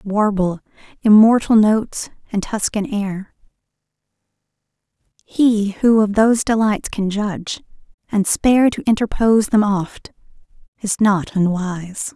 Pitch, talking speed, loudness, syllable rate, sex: 205 Hz, 110 wpm, -17 LUFS, 4.3 syllables/s, female